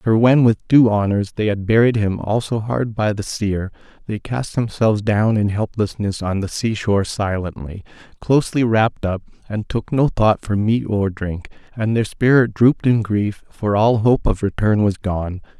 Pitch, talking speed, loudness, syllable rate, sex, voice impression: 105 Hz, 190 wpm, -18 LUFS, 4.6 syllables/s, male, very masculine, very adult-like, slightly old, very thick, slightly relaxed, slightly weak, slightly bright, slightly soft, slightly muffled, fluent, slightly cool, intellectual, sincere, slightly calm, mature, friendly, reassuring, slightly unique, wild, slightly lively, very kind, modest